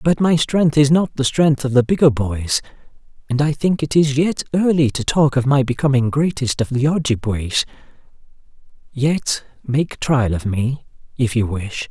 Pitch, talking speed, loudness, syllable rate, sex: 135 Hz, 175 wpm, -18 LUFS, 4.5 syllables/s, male